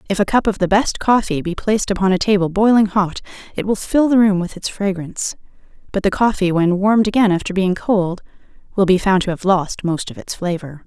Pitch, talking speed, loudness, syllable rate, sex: 190 Hz, 225 wpm, -17 LUFS, 5.7 syllables/s, female